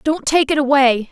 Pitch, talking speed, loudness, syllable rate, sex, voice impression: 280 Hz, 215 wpm, -15 LUFS, 5.0 syllables/s, female, feminine, adult-like, tensed, slightly powerful, clear, fluent, intellectual, calm, elegant, lively, slightly sharp